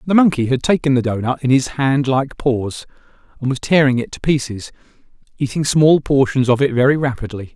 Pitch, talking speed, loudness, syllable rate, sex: 135 Hz, 190 wpm, -17 LUFS, 5.4 syllables/s, male